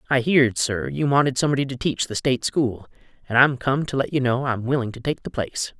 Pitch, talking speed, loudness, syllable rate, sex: 125 Hz, 250 wpm, -22 LUFS, 6.0 syllables/s, male